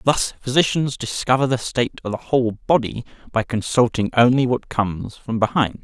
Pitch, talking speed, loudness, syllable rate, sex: 120 Hz, 165 wpm, -20 LUFS, 5.2 syllables/s, male